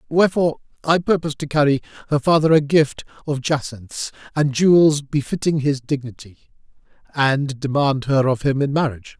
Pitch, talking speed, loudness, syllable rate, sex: 145 Hz, 150 wpm, -19 LUFS, 5.3 syllables/s, male